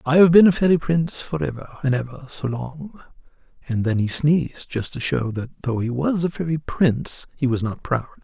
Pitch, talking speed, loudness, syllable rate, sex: 140 Hz, 210 wpm, -21 LUFS, 5.4 syllables/s, male